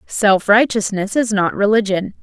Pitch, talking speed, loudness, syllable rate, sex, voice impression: 205 Hz, 135 wpm, -16 LUFS, 4.4 syllables/s, female, feminine, slightly young, slightly adult-like, thin, tensed, slightly powerful, bright, slightly hard, clear, fluent, cool, intellectual, very refreshing, sincere, calm, friendly, reassuring, slightly unique, wild, slightly sweet, very lively, slightly strict, slightly intense